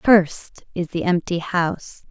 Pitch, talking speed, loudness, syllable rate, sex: 175 Hz, 145 wpm, -21 LUFS, 4.2 syllables/s, female